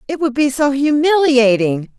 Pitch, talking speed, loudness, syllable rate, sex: 275 Hz, 150 wpm, -14 LUFS, 4.5 syllables/s, female